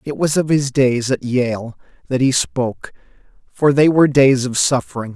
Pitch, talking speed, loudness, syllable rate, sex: 130 Hz, 185 wpm, -16 LUFS, 4.7 syllables/s, male